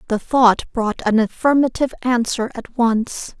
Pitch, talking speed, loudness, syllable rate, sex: 240 Hz, 140 wpm, -18 LUFS, 4.5 syllables/s, female